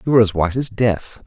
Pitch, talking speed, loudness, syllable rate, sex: 105 Hz, 285 wpm, -18 LUFS, 7.1 syllables/s, male